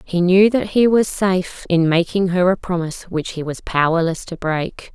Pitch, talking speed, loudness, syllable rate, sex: 180 Hz, 205 wpm, -18 LUFS, 4.8 syllables/s, female